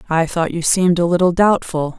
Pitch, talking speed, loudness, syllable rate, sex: 170 Hz, 210 wpm, -16 LUFS, 5.6 syllables/s, female